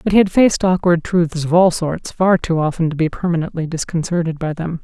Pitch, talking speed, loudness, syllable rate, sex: 170 Hz, 225 wpm, -17 LUFS, 5.6 syllables/s, female